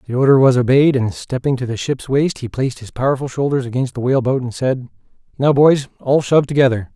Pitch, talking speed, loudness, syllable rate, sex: 130 Hz, 225 wpm, -17 LUFS, 6.2 syllables/s, male